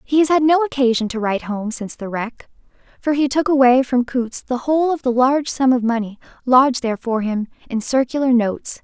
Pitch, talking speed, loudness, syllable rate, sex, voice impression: 255 Hz, 215 wpm, -18 LUFS, 5.8 syllables/s, female, very feminine, young, very thin, tensed, slightly powerful, very bright, hard, very clear, very fluent, very cute, intellectual, very refreshing, sincere, slightly calm, very friendly, very reassuring, slightly unique, very elegant, very sweet, very lively, kind, slightly intense, slightly modest